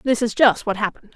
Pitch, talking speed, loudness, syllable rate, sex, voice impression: 220 Hz, 260 wpm, -19 LUFS, 6.3 syllables/s, female, feminine, slightly adult-like, slightly tensed, clear, fluent, slightly unique, slightly intense